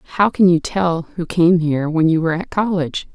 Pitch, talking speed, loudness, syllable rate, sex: 170 Hz, 230 wpm, -17 LUFS, 6.1 syllables/s, female